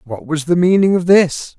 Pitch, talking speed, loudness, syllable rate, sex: 170 Hz, 230 wpm, -14 LUFS, 4.7 syllables/s, male